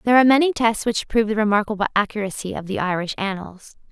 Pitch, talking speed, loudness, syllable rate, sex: 215 Hz, 200 wpm, -20 LUFS, 6.9 syllables/s, female